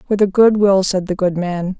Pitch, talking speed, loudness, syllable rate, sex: 190 Hz, 265 wpm, -15 LUFS, 5.0 syllables/s, female